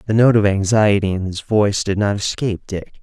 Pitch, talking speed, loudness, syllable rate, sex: 100 Hz, 220 wpm, -17 LUFS, 5.6 syllables/s, male